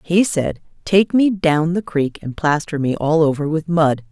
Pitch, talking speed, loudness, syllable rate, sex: 160 Hz, 205 wpm, -18 LUFS, 4.3 syllables/s, female